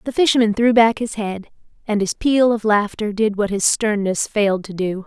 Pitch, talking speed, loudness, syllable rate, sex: 215 Hz, 215 wpm, -18 LUFS, 5.0 syllables/s, female